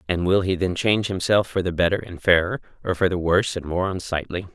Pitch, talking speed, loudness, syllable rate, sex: 90 Hz, 240 wpm, -22 LUFS, 6.2 syllables/s, male